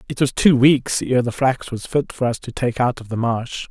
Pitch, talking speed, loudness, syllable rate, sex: 125 Hz, 275 wpm, -19 LUFS, 4.9 syllables/s, male